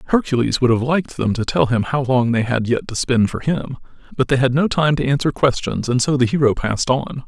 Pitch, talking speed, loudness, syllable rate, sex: 130 Hz, 255 wpm, -18 LUFS, 5.7 syllables/s, male